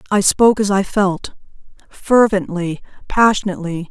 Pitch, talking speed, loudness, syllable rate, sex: 195 Hz, 90 wpm, -16 LUFS, 4.9 syllables/s, female